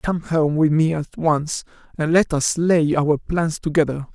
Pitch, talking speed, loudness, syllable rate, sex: 155 Hz, 190 wpm, -20 LUFS, 4.1 syllables/s, male